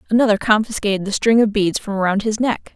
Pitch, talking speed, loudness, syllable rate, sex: 210 Hz, 220 wpm, -18 LUFS, 6.3 syllables/s, female